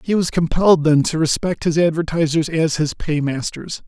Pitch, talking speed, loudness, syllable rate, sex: 160 Hz, 170 wpm, -18 LUFS, 5.1 syllables/s, male